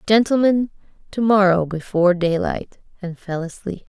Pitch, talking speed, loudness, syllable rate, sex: 195 Hz, 105 wpm, -19 LUFS, 4.8 syllables/s, female